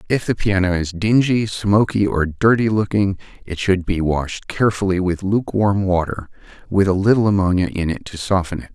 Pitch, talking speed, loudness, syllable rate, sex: 95 Hz, 180 wpm, -18 LUFS, 5.2 syllables/s, male